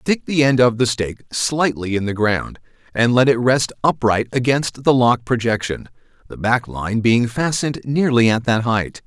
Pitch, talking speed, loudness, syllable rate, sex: 120 Hz, 185 wpm, -18 LUFS, 4.6 syllables/s, male